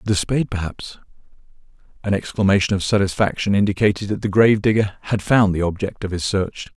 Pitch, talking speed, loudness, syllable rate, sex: 100 Hz, 170 wpm, -19 LUFS, 6.1 syllables/s, male